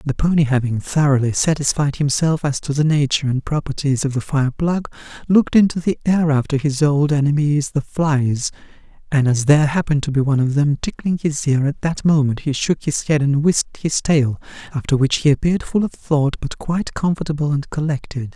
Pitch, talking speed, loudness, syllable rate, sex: 145 Hz, 200 wpm, -18 LUFS, 5.5 syllables/s, male